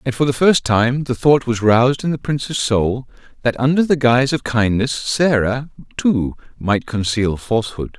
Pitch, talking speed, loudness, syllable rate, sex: 125 Hz, 180 wpm, -17 LUFS, 4.7 syllables/s, male